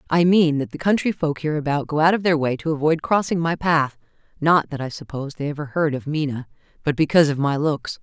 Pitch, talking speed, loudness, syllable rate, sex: 155 Hz, 225 wpm, -21 LUFS, 6.0 syllables/s, female